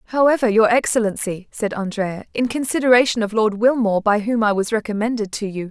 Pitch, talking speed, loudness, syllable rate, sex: 220 Hz, 180 wpm, -19 LUFS, 5.9 syllables/s, female